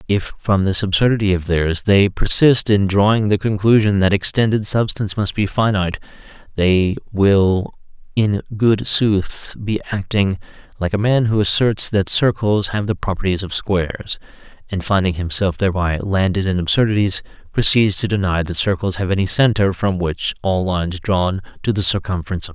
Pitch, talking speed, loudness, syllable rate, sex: 100 Hz, 165 wpm, -17 LUFS, 5.2 syllables/s, male